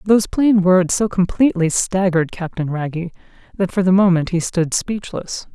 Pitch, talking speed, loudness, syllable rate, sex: 185 Hz, 160 wpm, -17 LUFS, 5.1 syllables/s, female